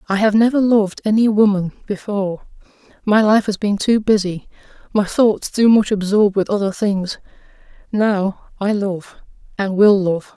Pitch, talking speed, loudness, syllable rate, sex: 205 Hz, 155 wpm, -17 LUFS, 4.7 syllables/s, female